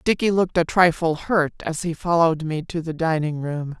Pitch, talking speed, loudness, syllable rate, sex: 165 Hz, 205 wpm, -21 LUFS, 5.2 syllables/s, female